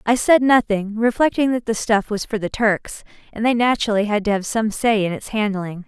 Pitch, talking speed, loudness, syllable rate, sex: 220 Hz, 225 wpm, -19 LUFS, 5.3 syllables/s, female